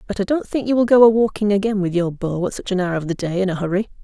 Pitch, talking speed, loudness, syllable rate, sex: 200 Hz, 340 wpm, -19 LUFS, 6.9 syllables/s, female